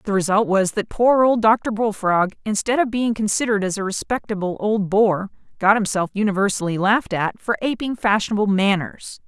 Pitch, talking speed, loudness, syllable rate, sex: 210 Hz, 170 wpm, -20 LUFS, 5.4 syllables/s, female